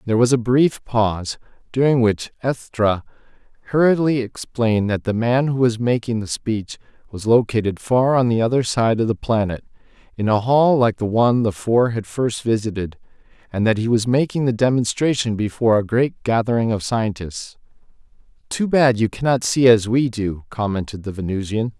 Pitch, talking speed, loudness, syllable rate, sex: 115 Hz, 175 wpm, -19 LUFS, 5.1 syllables/s, male